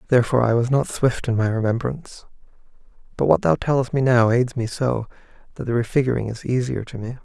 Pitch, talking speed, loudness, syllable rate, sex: 125 Hz, 200 wpm, -21 LUFS, 6.3 syllables/s, male